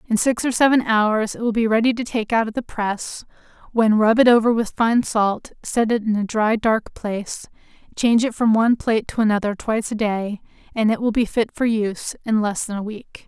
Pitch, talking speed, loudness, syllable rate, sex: 220 Hz, 230 wpm, -20 LUFS, 5.3 syllables/s, female